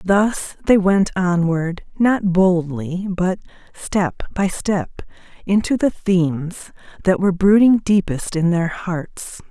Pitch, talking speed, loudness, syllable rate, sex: 185 Hz, 125 wpm, -18 LUFS, 3.6 syllables/s, female